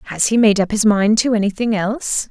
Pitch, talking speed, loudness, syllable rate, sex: 215 Hz, 235 wpm, -16 LUFS, 5.7 syllables/s, female